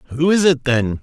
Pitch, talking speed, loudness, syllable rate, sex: 140 Hz, 235 wpm, -16 LUFS, 4.9 syllables/s, male